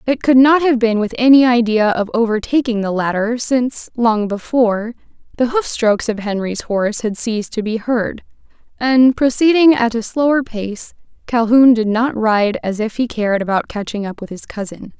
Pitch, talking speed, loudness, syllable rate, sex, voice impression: 230 Hz, 180 wpm, -16 LUFS, 5.0 syllables/s, female, very feminine, young, very thin, slightly tensed, slightly weak, very bright, soft, very clear, fluent, slightly raspy, cute, intellectual, very refreshing, sincere, calm, friendly, reassuring, very unique, elegant, very sweet, very lively, slightly kind, sharp, slightly modest, light